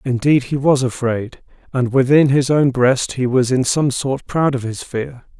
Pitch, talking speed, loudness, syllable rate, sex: 130 Hz, 200 wpm, -17 LUFS, 4.3 syllables/s, male